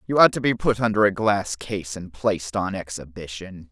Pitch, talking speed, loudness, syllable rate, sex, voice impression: 100 Hz, 210 wpm, -23 LUFS, 5.1 syllables/s, male, masculine, adult-like, tensed, powerful, bright, slightly clear, raspy, cool, intellectual, mature, friendly, wild, lively, slightly intense